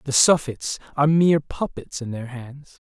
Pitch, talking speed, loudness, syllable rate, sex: 140 Hz, 165 wpm, -21 LUFS, 5.2 syllables/s, male